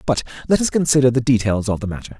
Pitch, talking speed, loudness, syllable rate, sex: 125 Hz, 245 wpm, -18 LUFS, 7.1 syllables/s, male